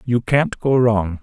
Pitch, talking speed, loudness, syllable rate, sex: 115 Hz, 195 wpm, -17 LUFS, 3.5 syllables/s, male